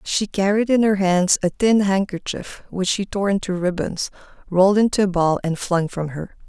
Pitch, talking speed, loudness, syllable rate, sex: 190 Hz, 195 wpm, -20 LUFS, 4.8 syllables/s, female